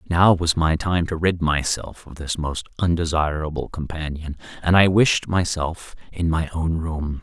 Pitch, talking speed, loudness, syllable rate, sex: 80 Hz, 165 wpm, -21 LUFS, 4.3 syllables/s, male